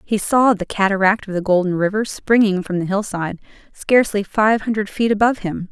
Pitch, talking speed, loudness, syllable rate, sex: 200 Hz, 190 wpm, -18 LUFS, 5.7 syllables/s, female